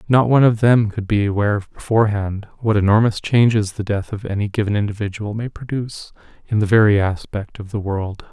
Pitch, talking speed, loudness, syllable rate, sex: 105 Hz, 190 wpm, -18 LUFS, 5.8 syllables/s, male